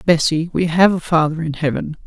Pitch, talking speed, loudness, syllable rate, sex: 165 Hz, 175 wpm, -17 LUFS, 5.4 syllables/s, female